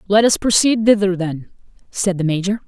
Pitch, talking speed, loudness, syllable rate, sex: 195 Hz, 180 wpm, -16 LUFS, 5.3 syllables/s, female